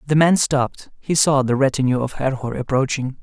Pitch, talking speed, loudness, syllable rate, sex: 135 Hz, 185 wpm, -19 LUFS, 5.4 syllables/s, male